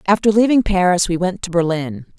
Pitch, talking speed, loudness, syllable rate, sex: 185 Hz, 190 wpm, -16 LUFS, 5.6 syllables/s, female